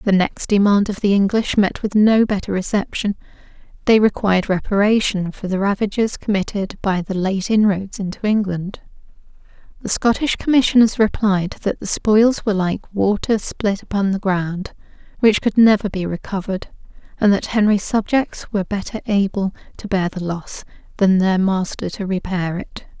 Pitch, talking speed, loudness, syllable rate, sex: 200 Hz, 155 wpm, -18 LUFS, 4.9 syllables/s, female